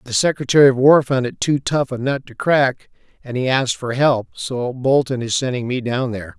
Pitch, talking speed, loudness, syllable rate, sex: 130 Hz, 225 wpm, -18 LUFS, 5.3 syllables/s, male